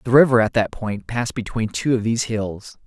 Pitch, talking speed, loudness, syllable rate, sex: 115 Hz, 230 wpm, -20 LUFS, 5.6 syllables/s, male